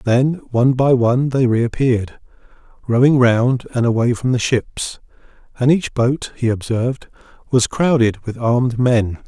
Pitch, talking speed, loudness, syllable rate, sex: 125 Hz, 150 wpm, -17 LUFS, 4.5 syllables/s, male